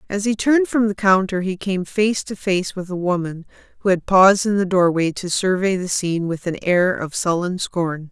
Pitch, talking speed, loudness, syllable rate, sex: 185 Hz, 220 wpm, -19 LUFS, 5.0 syllables/s, female